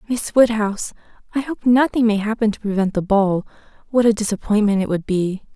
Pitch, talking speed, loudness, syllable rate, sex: 215 Hz, 185 wpm, -19 LUFS, 5.7 syllables/s, female